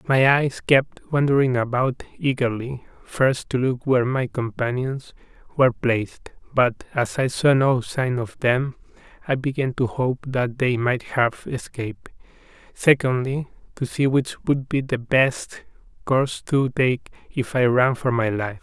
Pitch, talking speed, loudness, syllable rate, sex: 130 Hz, 155 wpm, -22 LUFS, 4.2 syllables/s, male